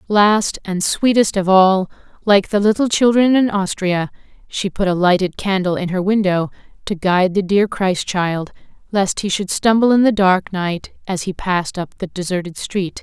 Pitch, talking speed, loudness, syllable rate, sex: 195 Hz, 185 wpm, -17 LUFS, 4.6 syllables/s, female